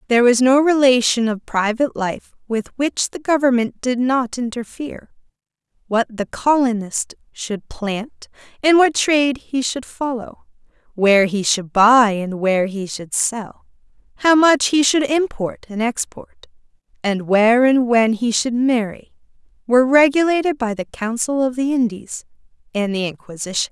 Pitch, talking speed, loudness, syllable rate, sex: 240 Hz, 150 wpm, -18 LUFS, 4.5 syllables/s, female